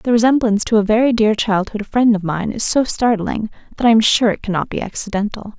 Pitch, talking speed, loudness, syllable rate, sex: 220 Hz, 225 wpm, -16 LUFS, 5.9 syllables/s, female